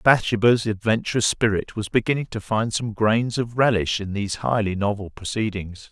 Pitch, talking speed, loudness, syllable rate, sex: 110 Hz, 160 wpm, -22 LUFS, 5.2 syllables/s, male